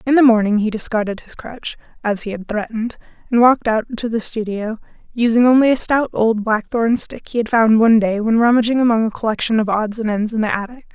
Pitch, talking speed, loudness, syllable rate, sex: 225 Hz, 225 wpm, -17 LUFS, 6.0 syllables/s, female